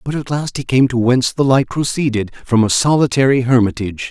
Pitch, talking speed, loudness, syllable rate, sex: 125 Hz, 190 wpm, -15 LUFS, 5.9 syllables/s, male